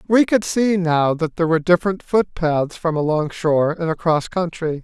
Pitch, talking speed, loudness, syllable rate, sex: 170 Hz, 185 wpm, -19 LUFS, 5.2 syllables/s, male